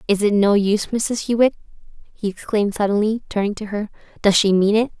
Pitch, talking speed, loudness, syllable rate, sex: 210 Hz, 190 wpm, -19 LUFS, 5.8 syllables/s, female